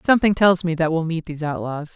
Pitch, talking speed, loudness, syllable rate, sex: 170 Hz, 245 wpm, -20 LUFS, 6.6 syllables/s, female